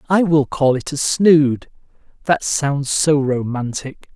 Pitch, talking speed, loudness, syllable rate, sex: 145 Hz, 130 wpm, -17 LUFS, 3.6 syllables/s, male